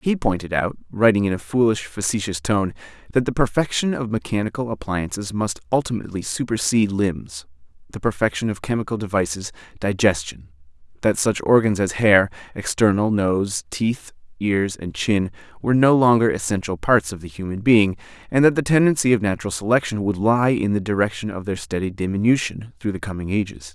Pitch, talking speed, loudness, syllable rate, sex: 105 Hz, 160 wpm, -21 LUFS, 5.5 syllables/s, male